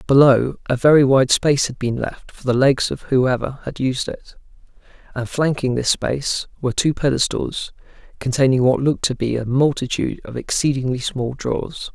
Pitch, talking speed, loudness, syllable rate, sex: 130 Hz, 170 wpm, -19 LUFS, 5.2 syllables/s, male